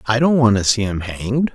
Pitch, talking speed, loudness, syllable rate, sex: 120 Hz, 270 wpm, -17 LUFS, 5.6 syllables/s, male